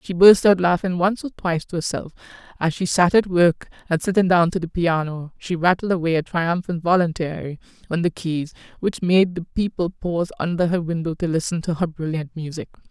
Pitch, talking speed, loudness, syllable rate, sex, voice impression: 170 Hz, 200 wpm, -21 LUFS, 5.5 syllables/s, female, slightly feminine, adult-like, intellectual, slightly calm, slightly strict